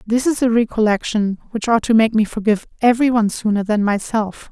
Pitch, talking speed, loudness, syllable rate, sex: 220 Hz, 200 wpm, -17 LUFS, 6.1 syllables/s, female